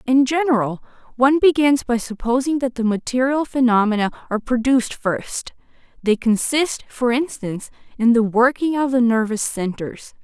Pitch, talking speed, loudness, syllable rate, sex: 245 Hz, 140 wpm, -19 LUFS, 5.0 syllables/s, female